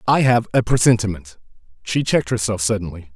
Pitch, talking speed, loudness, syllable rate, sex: 105 Hz, 135 wpm, -18 LUFS, 6.0 syllables/s, male